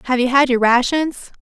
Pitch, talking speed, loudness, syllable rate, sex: 260 Hz, 210 wpm, -16 LUFS, 5.2 syllables/s, female